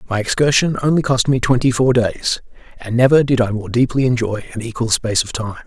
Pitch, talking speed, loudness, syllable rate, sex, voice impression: 120 Hz, 210 wpm, -17 LUFS, 5.8 syllables/s, male, very masculine, very adult-like, thick, cool, sincere, calm, slightly mature, reassuring